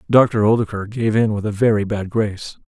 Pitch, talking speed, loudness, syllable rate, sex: 105 Hz, 200 wpm, -18 LUFS, 5.4 syllables/s, male